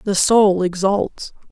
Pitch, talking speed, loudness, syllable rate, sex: 195 Hz, 120 wpm, -17 LUFS, 3.2 syllables/s, female